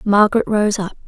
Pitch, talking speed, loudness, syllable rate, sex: 205 Hz, 165 wpm, -16 LUFS, 5.6 syllables/s, female